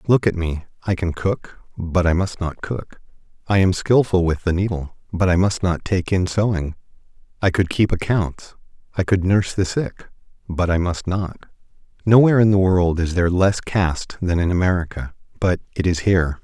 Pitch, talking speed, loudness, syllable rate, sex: 90 Hz, 190 wpm, -20 LUFS, 5.2 syllables/s, male